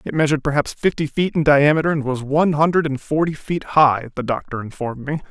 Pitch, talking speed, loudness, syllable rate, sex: 145 Hz, 215 wpm, -19 LUFS, 6.1 syllables/s, male